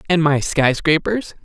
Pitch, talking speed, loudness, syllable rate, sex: 160 Hz, 165 wpm, -17 LUFS, 4.1 syllables/s, male